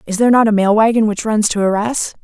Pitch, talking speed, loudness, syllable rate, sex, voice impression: 215 Hz, 270 wpm, -14 LUFS, 6.4 syllables/s, female, feminine, adult-like, slightly relaxed, slightly dark, clear, raspy, intellectual, slightly refreshing, reassuring, elegant, kind, modest